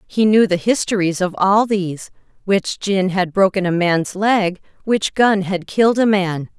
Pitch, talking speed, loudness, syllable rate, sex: 195 Hz, 175 wpm, -17 LUFS, 4.4 syllables/s, female